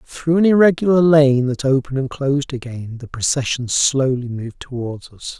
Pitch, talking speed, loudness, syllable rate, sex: 135 Hz, 165 wpm, -17 LUFS, 5.2 syllables/s, male